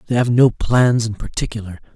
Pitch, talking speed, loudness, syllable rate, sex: 115 Hz, 185 wpm, -17 LUFS, 5.6 syllables/s, male